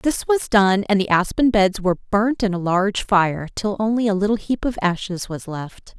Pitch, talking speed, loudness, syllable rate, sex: 200 Hz, 220 wpm, -20 LUFS, 4.8 syllables/s, female